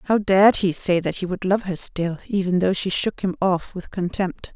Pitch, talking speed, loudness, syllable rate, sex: 185 Hz, 235 wpm, -22 LUFS, 5.0 syllables/s, female